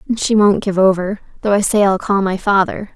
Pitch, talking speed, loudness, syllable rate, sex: 200 Hz, 245 wpm, -15 LUFS, 5.5 syllables/s, female